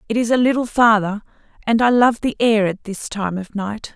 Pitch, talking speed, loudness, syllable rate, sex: 220 Hz, 230 wpm, -18 LUFS, 5.2 syllables/s, female